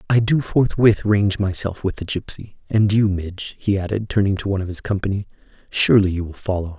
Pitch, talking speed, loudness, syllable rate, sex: 100 Hz, 205 wpm, -20 LUFS, 5.9 syllables/s, male